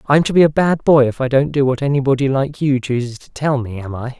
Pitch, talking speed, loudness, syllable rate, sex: 135 Hz, 285 wpm, -16 LUFS, 5.9 syllables/s, male